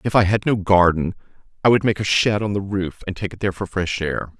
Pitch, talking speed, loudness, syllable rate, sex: 95 Hz, 275 wpm, -20 LUFS, 6.0 syllables/s, male